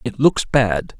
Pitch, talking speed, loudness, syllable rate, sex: 130 Hz, 180 wpm, -18 LUFS, 3.4 syllables/s, male